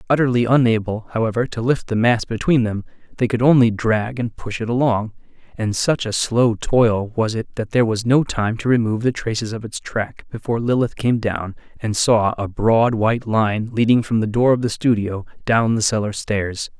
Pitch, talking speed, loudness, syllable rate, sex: 115 Hz, 200 wpm, -19 LUFS, 5.1 syllables/s, male